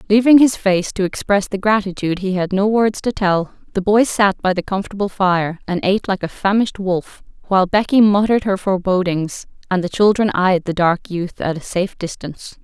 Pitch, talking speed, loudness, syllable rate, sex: 195 Hz, 200 wpm, -17 LUFS, 5.5 syllables/s, female